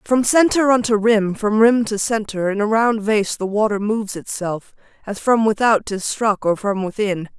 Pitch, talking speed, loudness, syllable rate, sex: 210 Hz, 195 wpm, -18 LUFS, 4.6 syllables/s, female